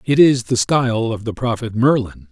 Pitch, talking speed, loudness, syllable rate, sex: 120 Hz, 205 wpm, -17 LUFS, 5.0 syllables/s, male